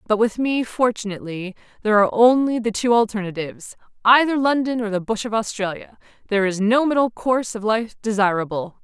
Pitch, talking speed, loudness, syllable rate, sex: 220 Hz, 165 wpm, -20 LUFS, 6.0 syllables/s, female